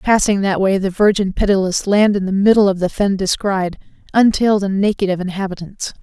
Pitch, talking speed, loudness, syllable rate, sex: 195 Hz, 190 wpm, -16 LUFS, 5.6 syllables/s, female